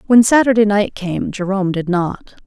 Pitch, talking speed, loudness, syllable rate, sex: 200 Hz, 170 wpm, -16 LUFS, 5.0 syllables/s, female